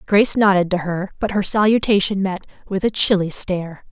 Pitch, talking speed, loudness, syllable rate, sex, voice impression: 195 Hz, 185 wpm, -18 LUFS, 5.6 syllables/s, female, feminine, adult-like, tensed, slightly powerful, slightly hard, fluent, slightly raspy, intellectual, calm, reassuring, elegant, lively, slightly sharp